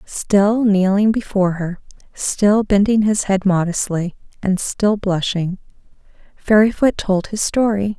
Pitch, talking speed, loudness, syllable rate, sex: 200 Hz, 120 wpm, -17 LUFS, 4.0 syllables/s, female